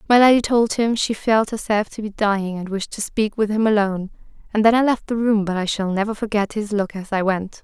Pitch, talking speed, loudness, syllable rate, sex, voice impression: 210 Hz, 260 wpm, -20 LUFS, 5.7 syllables/s, female, very feminine, young, very thin, slightly relaxed, slightly weak, bright, soft, clear, fluent, cute, intellectual, very refreshing, sincere, very calm, very friendly, very reassuring, slightly unique, elegant, slightly wild, sweet, lively, kind, slightly modest, light